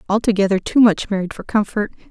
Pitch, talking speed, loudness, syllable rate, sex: 205 Hz, 170 wpm, -18 LUFS, 6.2 syllables/s, female